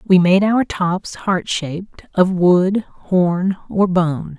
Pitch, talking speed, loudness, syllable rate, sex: 185 Hz, 150 wpm, -17 LUFS, 3.1 syllables/s, female